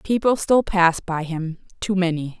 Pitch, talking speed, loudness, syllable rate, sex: 180 Hz, 150 wpm, -20 LUFS, 4.6 syllables/s, female